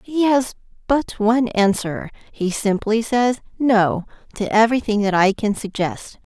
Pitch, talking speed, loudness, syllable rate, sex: 220 Hz, 130 wpm, -19 LUFS, 4.2 syllables/s, female